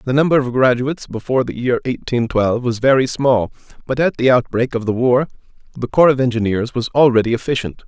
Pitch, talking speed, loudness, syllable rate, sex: 125 Hz, 200 wpm, -17 LUFS, 6.1 syllables/s, male